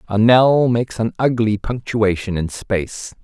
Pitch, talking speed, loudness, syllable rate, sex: 110 Hz, 150 wpm, -17 LUFS, 4.4 syllables/s, male